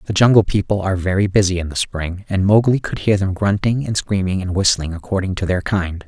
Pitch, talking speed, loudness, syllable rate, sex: 95 Hz, 225 wpm, -18 LUFS, 5.8 syllables/s, male